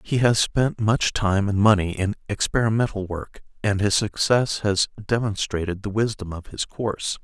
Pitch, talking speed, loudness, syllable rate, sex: 105 Hz, 165 wpm, -23 LUFS, 4.6 syllables/s, male